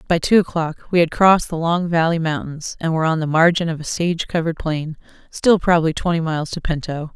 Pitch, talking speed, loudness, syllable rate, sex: 165 Hz, 220 wpm, -19 LUFS, 6.0 syllables/s, female